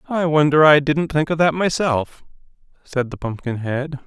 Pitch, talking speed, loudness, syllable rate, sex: 145 Hz, 160 wpm, -18 LUFS, 4.6 syllables/s, male